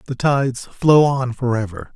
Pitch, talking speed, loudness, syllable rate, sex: 130 Hz, 155 wpm, -18 LUFS, 4.6 syllables/s, male